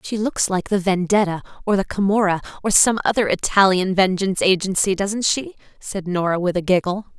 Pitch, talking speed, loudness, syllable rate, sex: 195 Hz, 175 wpm, -19 LUFS, 5.5 syllables/s, female